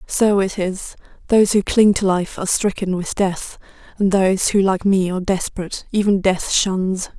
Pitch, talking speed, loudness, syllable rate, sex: 190 Hz, 185 wpm, -18 LUFS, 5.0 syllables/s, female